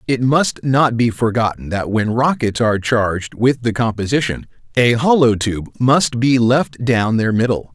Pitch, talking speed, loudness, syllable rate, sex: 120 Hz, 170 wpm, -16 LUFS, 4.4 syllables/s, male